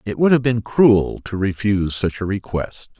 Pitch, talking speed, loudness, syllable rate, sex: 105 Hz, 200 wpm, -19 LUFS, 4.7 syllables/s, male